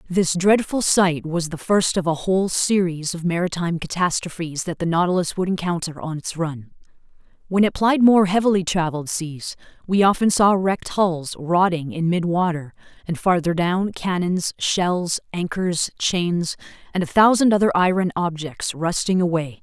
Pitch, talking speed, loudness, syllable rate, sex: 175 Hz, 155 wpm, -20 LUFS, 4.7 syllables/s, female